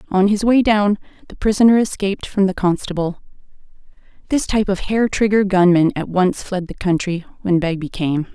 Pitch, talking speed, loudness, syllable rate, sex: 190 Hz, 175 wpm, -18 LUFS, 5.4 syllables/s, female